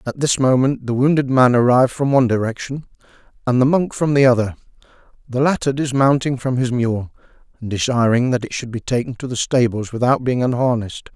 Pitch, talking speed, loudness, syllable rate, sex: 125 Hz, 190 wpm, -18 LUFS, 5.9 syllables/s, male